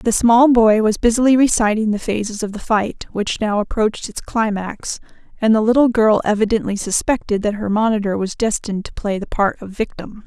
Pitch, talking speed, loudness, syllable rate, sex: 215 Hz, 195 wpm, -17 LUFS, 5.3 syllables/s, female